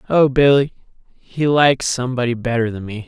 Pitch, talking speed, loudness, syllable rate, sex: 130 Hz, 135 wpm, -17 LUFS, 5.7 syllables/s, male